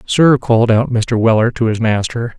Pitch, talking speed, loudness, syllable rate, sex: 115 Hz, 200 wpm, -14 LUFS, 4.9 syllables/s, male